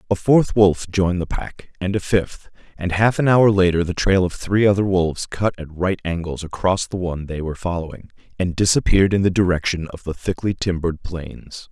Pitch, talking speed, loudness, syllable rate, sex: 90 Hz, 205 wpm, -20 LUFS, 5.3 syllables/s, male